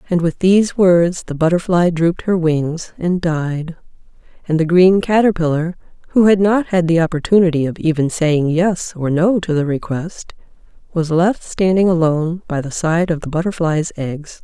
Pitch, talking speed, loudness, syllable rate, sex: 170 Hz, 170 wpm, -16 LUFS, 4.8 syllables/s, female